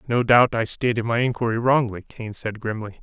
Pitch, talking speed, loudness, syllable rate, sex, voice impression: 115 Hz, 200 wpm, -21 LUFS, 5.4 syllables/s, male, masculine, adult-like, slightly thick, tensed, powerful, clear, fluent, cool, intellectual, sincere, slightly calm, slightly friendly, wild, lively, slightly kind